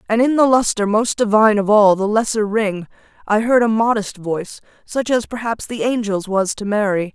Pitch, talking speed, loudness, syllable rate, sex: 215 Hz, 200 wpm, -17 LUFS, 5.2 syllables/s, female